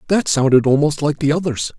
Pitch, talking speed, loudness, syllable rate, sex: 150 Hz, 200 wpm, -16 LUFS, 5.8 syllables/s, male